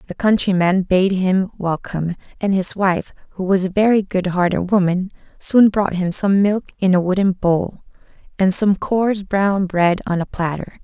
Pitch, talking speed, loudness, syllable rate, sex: 190 Hz, 175 wpm, -18 LUFS, 4.6 syllables/s, female